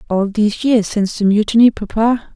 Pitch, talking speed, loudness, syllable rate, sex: 215 Hz, 180 wpm, -15 LUFS, 5.6 syllables/s, female